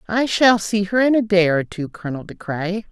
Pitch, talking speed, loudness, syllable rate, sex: 200 Hz, 245 wpm, -19 LUFS, 5.1 syllables/s, female